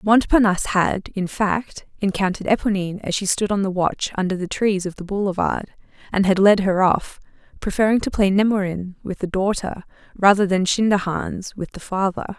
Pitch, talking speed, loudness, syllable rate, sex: 195 Hz, 175 wpm, -20 LUFS, 5.4 syllables/s, female